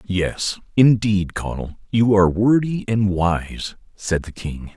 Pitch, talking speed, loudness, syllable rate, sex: 100 Hz, 140 wpm, -19 LUFS, 3.7 syllables/s, male